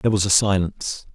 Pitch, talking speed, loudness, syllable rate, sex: 100 Hz, 210 wpm, -20 LUFS, 6.7 syllables/s, male